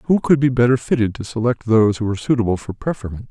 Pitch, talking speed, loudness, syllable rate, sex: 115 Hz, 235 wpm, -18 LUFS, 6.7 syllables/s, male